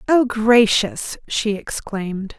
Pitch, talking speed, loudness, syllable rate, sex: 215 Hz, 100 wpm, -19 LUFS, 3.4 syllables/s, female